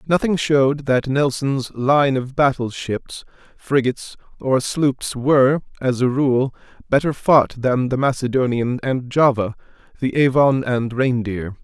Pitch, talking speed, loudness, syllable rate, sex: 130 Hz, 135 wpm, -19 LUFS, 4.1 syllables/s, male